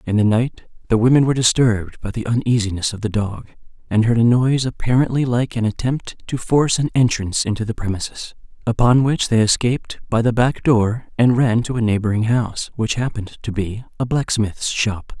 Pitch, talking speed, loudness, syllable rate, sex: 115 Hz, 195 wpm, -19 LUFS, 5.6 syllables/s, male